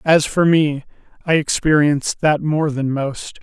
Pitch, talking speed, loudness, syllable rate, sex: 150 Hz, 160 wpm, -17 LUFS, 4.2 syllables/s, male